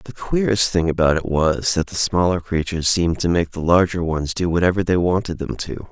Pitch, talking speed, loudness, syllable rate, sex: 85 Hz, 225 wpm, -19 LUFS, 5.6 syllables/s, male